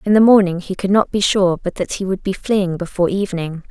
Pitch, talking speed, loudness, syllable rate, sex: 190 Hz, 260 wpm, -17 LUFS, 6.0 syllables/s, female